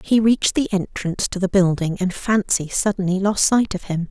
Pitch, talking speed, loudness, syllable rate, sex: 195 Hz, 205 wpm, -20 LUFS, 5.3 syllables/s, female